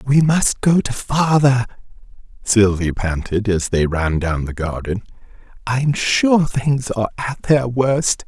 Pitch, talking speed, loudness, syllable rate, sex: 120 Hz, 145 wpm, -18 LUFS, 3.8 syllables/s, male